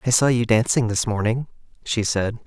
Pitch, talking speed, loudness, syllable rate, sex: 115 Hz, 195 wpm, -21 LUFS, 5.2 syllables/s, male